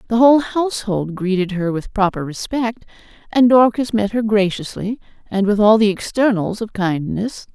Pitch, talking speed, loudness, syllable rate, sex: 210 Hz, 160 wpm, -18 LUFS, 4.9 syllables/s, female